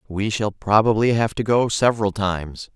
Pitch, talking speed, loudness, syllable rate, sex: 105 Hz, 175 wpm, -20 LUFS, 5.1 syllables/s, male